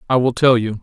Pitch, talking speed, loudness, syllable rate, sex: 120 Hz, 290 wpm, -15 LUFS, 6.2 syllables/s, male